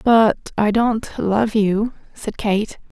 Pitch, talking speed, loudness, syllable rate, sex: 215 Hz, 140 wpm, -19 LUFS, 2.8 syllables/s, female